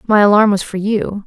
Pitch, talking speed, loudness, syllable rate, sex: 205 Hz, 240 wpm, -14 LUFS, 5.1 syllables/s, female